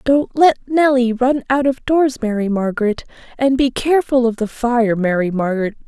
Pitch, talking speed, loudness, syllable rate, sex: 245 Hz, 175 wpm, -16 LUFS, 5.0 syllables/s, female